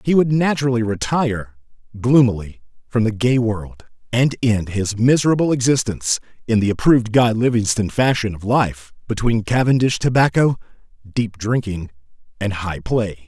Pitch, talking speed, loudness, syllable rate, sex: 115 Hz, 135 wpm, -18 LUFS, 5.1 syllables/s, male